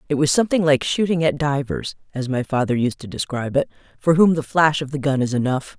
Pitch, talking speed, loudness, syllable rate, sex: 145 Hz, 220 wpm, -20 LUFS, 6.0 syllables/s, female